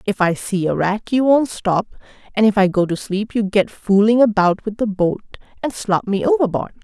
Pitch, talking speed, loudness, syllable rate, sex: 210 Hz, 220 wpm, -18 LUFS, 4.8 syllables/s, female